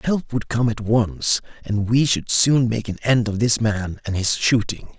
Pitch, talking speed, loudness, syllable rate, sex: 115 Hz, 215 wpm, -20 LUFS, 4.1 syllables/s, male